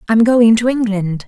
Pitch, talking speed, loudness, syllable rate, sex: 220 Hz, 190 wpm, -13 LUFS, 4.6 syllables/s, female